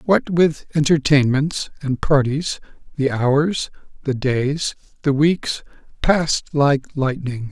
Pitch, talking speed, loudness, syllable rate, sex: 145 Hz, 110 wpm, -19 LUFS, 3.5 syllables/s, male